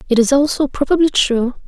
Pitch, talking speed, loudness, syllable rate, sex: 270 Hz, 180 wpm, -15 LUFS, 5.8 syllables/s, female